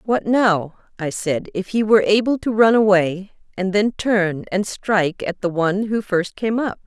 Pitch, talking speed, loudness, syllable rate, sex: 200 Hz, 200 wpm, -19 LUFS, 4.6 syllables/s, female